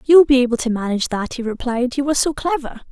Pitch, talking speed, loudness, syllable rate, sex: 255 Hz, 265 wpm, -18 LUFS, 7.0 syllables/s, female